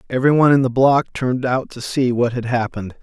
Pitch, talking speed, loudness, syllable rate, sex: 125 Hz, 220 wpm, -18 LUFS, 6.0 syllables/s, male